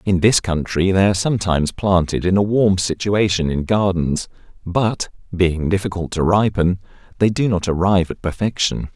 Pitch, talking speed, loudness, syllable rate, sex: 95 Hz, 160 wpm, -18 LUFS, 5.1 syllables/s, male